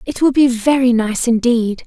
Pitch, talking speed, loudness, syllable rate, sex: 240 Hz, 195 wpm, -15 LUFS, 4.6 syllables/s, female